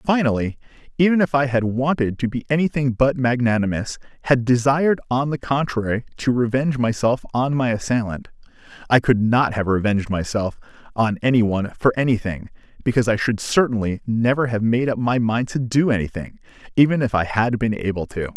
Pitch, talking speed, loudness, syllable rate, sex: 120 Hz, 175 wpm, -20 LUFS, 5.6 syllables/s, male